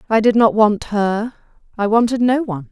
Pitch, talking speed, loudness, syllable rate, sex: 220 Hz, 200 wpm, -16 LUFS, 5.3 syllables/s, female